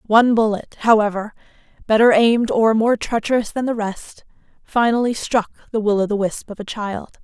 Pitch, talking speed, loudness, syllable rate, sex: 220 Hz, 165 wpm, -18 LUFS, 5.3 syllables/s, female